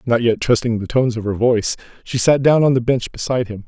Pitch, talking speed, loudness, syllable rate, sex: 120 Hz, 260 wpm, -17 LUFS, 6.4 syllables/s, male